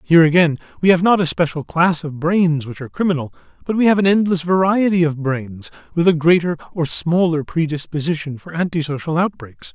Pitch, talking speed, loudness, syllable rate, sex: 165 Hz, 185 wpm, -17 LUFS, 5.7 syllables/s, male